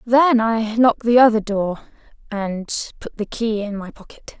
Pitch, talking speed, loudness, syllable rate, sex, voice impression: 220 Hz, 175 wpm, -19 LUFS, 4.4 syllables/s, female, feminine, slightly adult-like, clear, slightly cute, slightly refreshing, friendly, slightly lively